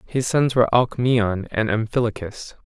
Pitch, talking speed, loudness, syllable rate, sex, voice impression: 115 Hz, 135 wpm, -20 LUFS, 4.6 syllables/s, male, very masculine, slightly young, slightly adult-like, slightly thick, slightly tensed, slightly powerful, slightly dark, hard, slightly muffled, fluent, cool, intellectual, refreshing, very sincere, very calm, friendly, slightly reassuring, slightly unique, slightly elegant, slightly wild, sweet, very kind, very modest